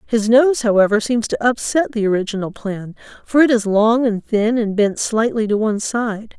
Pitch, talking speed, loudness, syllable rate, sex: 220 Hz, 195 wpm, -17 LUFS, 4.9 syllables/s, female